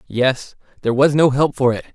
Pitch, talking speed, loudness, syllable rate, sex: 135 Hz, 215 wpm, -17 LUFS, 5.5 syllables/s, male